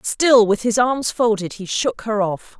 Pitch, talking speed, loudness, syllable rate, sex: 220 Hz, 210 wpm, -18 LUFS, 4.0 syllables/s, female